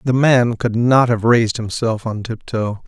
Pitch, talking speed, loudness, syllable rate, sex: 115 Hz, 190 wpm, -17 LUFS, 4.4 syllables/s, male